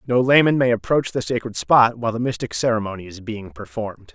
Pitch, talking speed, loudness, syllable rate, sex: 115 Hz, 205 wpm, -20 LUFS, 6.0 syllables/s, male